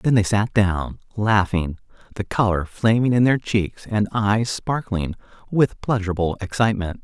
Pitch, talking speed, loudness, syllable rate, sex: 105 Hz, 145 wpm, -21 LUFS, 4.5 syllables/s, male